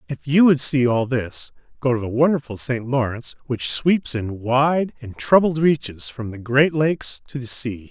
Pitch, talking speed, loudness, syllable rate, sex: 130 Hz, 195 wpm, -20 LUFS, 4.6 syllables/s, male